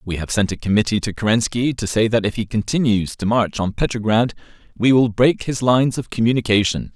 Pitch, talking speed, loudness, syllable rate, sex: 110 Hz, 205 wpm, -19 LUFS, 5.8 syllables/s, male